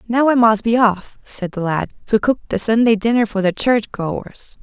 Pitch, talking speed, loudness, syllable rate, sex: 220 Hz, 220 wpm, -17 LUFS, 4.6 syllables/s, female